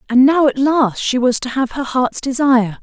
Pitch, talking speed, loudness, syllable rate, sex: 260 Hz, 235 wpm, -15 LUFS, 4.9 syllables/s, female